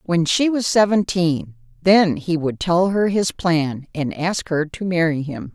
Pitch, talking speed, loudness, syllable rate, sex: 170 Hz, 185 wpm, -19 LUFS, 3.9 syllables/s, female